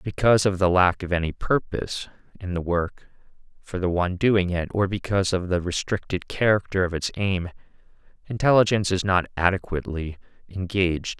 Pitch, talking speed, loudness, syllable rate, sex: 95 Hz, 155 wpm, -23 LUFS, 5.6 syllables/s, male